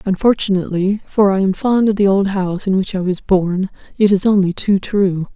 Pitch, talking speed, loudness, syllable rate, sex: 195 Hz, 215 wpm, -16 LUFS, 3.9 syllables/s, female